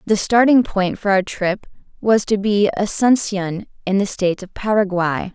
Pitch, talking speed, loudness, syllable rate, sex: 200 Hz, 170 wpm, -18 LUFS, 4.5 syllables/s, female